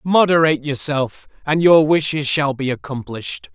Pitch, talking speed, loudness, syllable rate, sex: 145 Hz, 135 wpm, -17 LUFS, 4.9 syllables/s, male